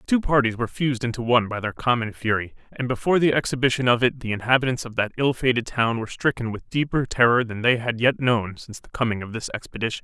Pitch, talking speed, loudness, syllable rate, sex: 120 Hz, 240 wpm, -22 LUFS, 6.7 syllables/s, male